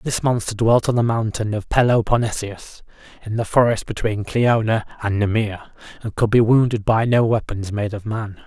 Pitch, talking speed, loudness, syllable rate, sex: 110 Hz, 175 wpm, -19 LUFS, 5.0 syllables/s, male